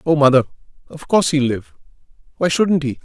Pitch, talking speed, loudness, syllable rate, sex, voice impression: 150 Hz, 180 wpm, -17 LUFS, 6.0 syllables/s, male, masculine, adult-like, tensed, clear, slightly halting, slightly intellectual, sincere, calm, friendly, reassuring, kind, modest